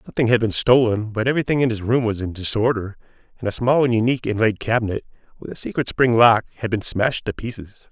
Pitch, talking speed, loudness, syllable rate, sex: 115 Hz, 220 wpm, -20 LUFS, 6.7 syllables/s, male